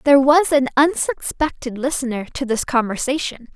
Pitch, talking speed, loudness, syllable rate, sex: 265 Hz, 135 wpm, -19 LUFS, 5.7 syllables/s, female